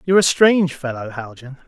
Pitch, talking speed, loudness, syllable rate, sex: 150 Hz, 180 wpm, -17 LUFS, 6.3 syllables/s, male